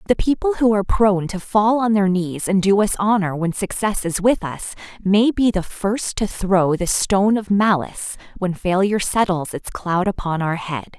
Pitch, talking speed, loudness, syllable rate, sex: 195 Hz, 200 wpm, -19 LUFS, 4.8 syllables/s, female